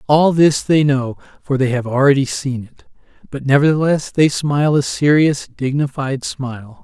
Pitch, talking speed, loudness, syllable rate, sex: 140 Hz, 160 wpm, -16 LUFS, 4.7 syllables/s, male